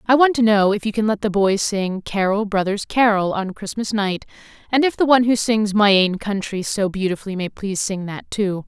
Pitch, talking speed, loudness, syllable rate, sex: 205 Hz, 230 wpm, -19 LUFS, 5.4 syllables/s, female